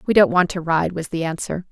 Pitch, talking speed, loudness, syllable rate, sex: 175 Hz, 280 wpm, -20 LUFS, 5.8 syllables/s, female